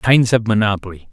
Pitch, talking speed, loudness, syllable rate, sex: 105 Hz, 160 wpm, -16 LUFS, 5.6 syllables/s, male